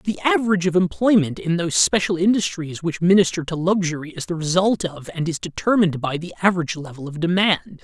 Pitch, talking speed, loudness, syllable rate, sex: 175 Hz, 190 wpm, -20 LUFS, 6.1 syllables/s, male